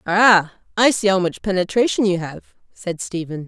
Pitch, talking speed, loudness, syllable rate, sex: 190 Hz, 175 wpm, -18 LUFS, 4.8 syllables/s, female